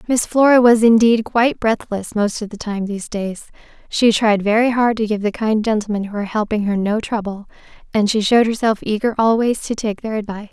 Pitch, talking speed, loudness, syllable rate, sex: 220 Hz, 210 wpm, -17 LUFS, 5.8 syllables/s, female